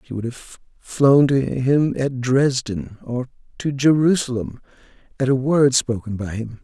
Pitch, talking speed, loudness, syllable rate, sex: 130 Hz, 155 wpm, -20 LUFS, 4.1 syllables/s, male